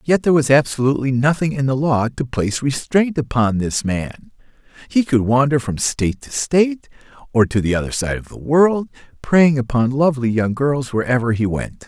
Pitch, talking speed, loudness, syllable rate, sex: 130 Hz, 185 wpm, -18 LUFS, 5.3 syllables/s, male